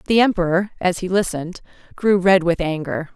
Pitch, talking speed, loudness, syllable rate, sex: 180 Hz, 170 wpm, -19 LUFS, 5.5 syllables/s, female